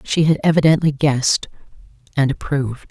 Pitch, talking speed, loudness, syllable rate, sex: 145 Hz, 125 wpm, -17 LUFS, 5.6 syllables/s, female